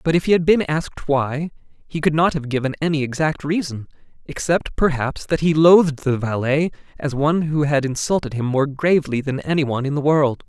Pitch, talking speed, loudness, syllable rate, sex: 150 Hz, 205 wpm, -19 LUFS, 5.5 syllables/s, male